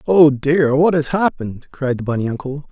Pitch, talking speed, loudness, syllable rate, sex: 145 Hz, 200 wpm, -17 LUFS, 5.1 syllables/s, male